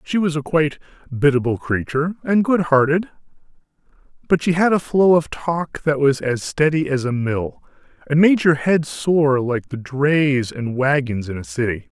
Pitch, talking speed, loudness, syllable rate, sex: 145 Hz, 180 wpm, -19 LUFS, 4.6 syllables/s, male